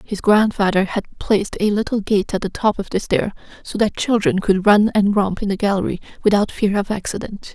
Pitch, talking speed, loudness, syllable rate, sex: 205 Hz, 215 wpm, -18 LUFS, 5.4 syllables/s, female